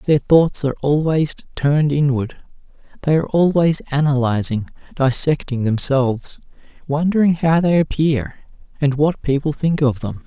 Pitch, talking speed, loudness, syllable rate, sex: 145 Hz, 130 wpm, -18 LUFS, 4.7 syllables/s, male